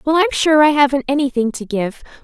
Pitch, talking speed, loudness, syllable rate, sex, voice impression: 280 Hz, 215 wpm, -16 LUFS, 6.0 syllables/s, female, feminine, slightly adult-like, tensed, slightly fluent, sincere, lively